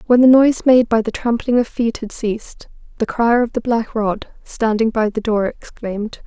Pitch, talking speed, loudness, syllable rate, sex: 230 Hz, 210 wpm, -17 LUFS, 4.9 syllables/s, female